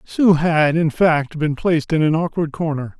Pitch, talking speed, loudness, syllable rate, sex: 160 Hz, 200 wpm, -18 LUFS, 4.5 syllables/s, male